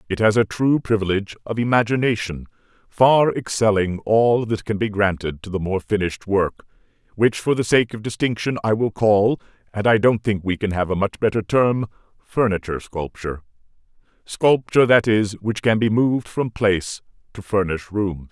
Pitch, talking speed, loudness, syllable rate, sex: 105 Hz, 165 wpm, -20 LUFS, 5.1 syllables/s, male